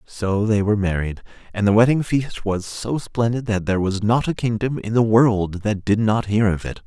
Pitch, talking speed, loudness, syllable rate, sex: 110 Hz, 225 wpm, -20 LUFS, 5.0 syllables/s, male